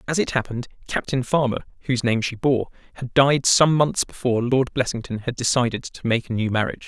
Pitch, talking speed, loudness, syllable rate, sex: 125 Hz, 200 wpm, -22 LUFS, 6.0 syllables/s, male